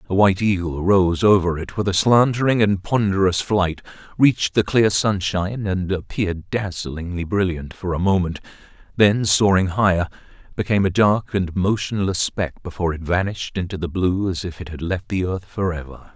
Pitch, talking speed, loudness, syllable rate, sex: 95 Hz, 170 wpm, -20 LUFS, 5.1 syllables/s, male